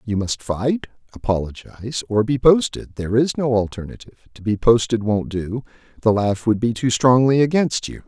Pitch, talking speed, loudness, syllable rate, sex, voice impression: 115 Hz, 180 wpm, -19 LUFS, 5.2 syllables/s, male, very masculine, very adult-like, slightly old, very thick, slightly tensed, very powerful, slightly bright, soft, slightly muffled, fluent, very cool, very intellectual, sincere, very calm, very mature, very friendly, reassuring, unique, very elegant, wild, slightly sweet, slightly lively, kind, slightly modest